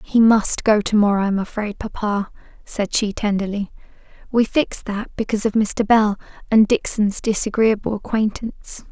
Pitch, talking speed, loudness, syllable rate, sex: 210 Hz, 150 wpm, -19 LUFS, 4.9 syllables/s, female